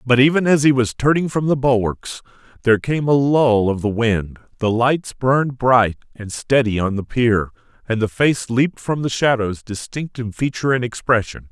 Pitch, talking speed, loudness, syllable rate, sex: 125 Hz, 195 wpm, -18 LUFS, 4.9 syllables/s, male